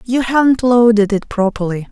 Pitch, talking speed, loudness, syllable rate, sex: 225 Hz, 155 wpm, -14 LUFS, 5.0 syllables/s, female